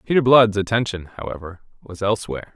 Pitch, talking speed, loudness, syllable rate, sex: 100 Hz, 140 wpm, -20 LUFS, 6.4 syllables/s, male